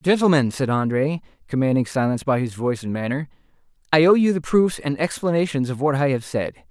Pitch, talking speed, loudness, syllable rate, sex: 140 Hz, 195 wpm, -21 LUFS, 6.1 syllables/s, male